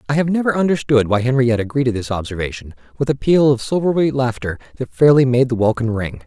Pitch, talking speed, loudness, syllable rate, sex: 125 Hz, 200 wpm, -17 LUFS, 6.2 syllables/s, male